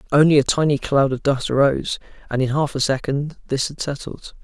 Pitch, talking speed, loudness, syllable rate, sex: 140 Hz, 205 wpm, -20 LUFS, 5.7 syllables/s, male